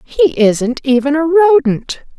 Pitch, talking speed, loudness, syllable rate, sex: 285 Hz, 135 wpm, -13 LUFS, 6.3 syllables/s, female